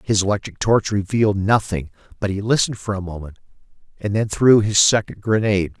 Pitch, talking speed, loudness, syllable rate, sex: 105 Hz, 175 wpm, -19 LUFS, 5.9 syllables/s, male